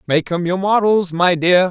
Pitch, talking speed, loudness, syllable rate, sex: 180 Hz, 210 wpm, -16 LUFS, 4.5 syllables/s, male